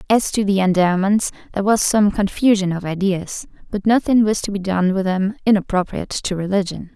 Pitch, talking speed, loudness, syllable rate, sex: 195 Hz, 180 wpm, -18 LUFS, 5.5 syllables/s, female